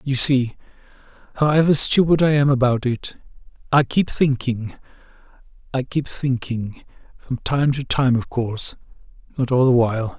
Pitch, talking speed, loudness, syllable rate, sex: 130 Hz, 135 wpm, -19 LUFS, 4.7 syllables/s, male